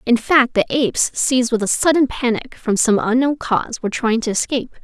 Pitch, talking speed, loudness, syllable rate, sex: 240 Hz, 210 wpm, -17 LUFS, 5.4 syllables/s, female